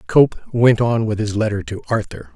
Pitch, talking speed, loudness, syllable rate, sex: 110 Hz, 205 wpm, -18 LUFS, 5.1 syllables/s, male